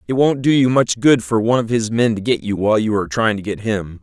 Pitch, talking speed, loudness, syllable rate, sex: 110 Hz, 315 wpm, -17 LUFS, 6.2 syllables/s, male